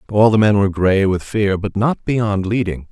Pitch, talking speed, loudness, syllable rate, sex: 100 Hz, 225 wpm, -16 LUFS, 4.8 syllables/s, male